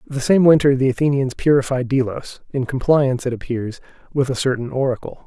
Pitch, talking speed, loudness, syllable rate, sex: 130 Hz, 170 wpm, -19 LUFS, 5.7 syllables/s, male